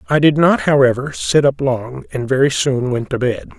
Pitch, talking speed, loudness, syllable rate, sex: 135 Hz, 220 wpm, -16 LUFS, 4.9 syllables/s, male